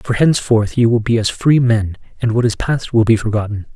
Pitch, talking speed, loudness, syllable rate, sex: 115 Hz, 240 wpm, -15 LUFS, 5.6 syllables/s, male